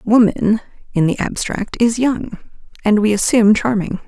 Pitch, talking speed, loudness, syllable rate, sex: 215 Hz, 145 wpm, -16 LUFS, 4.6 syllables/s, female